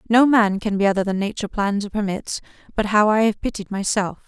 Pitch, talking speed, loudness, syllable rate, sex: 205 Hz, 225 wpm, -20 LUFS, 6.0 syllables/s, female